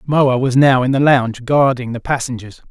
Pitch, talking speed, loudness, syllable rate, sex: 130 Hz, 200 wpm, -15 LUFS, 5.1 syllables/s, male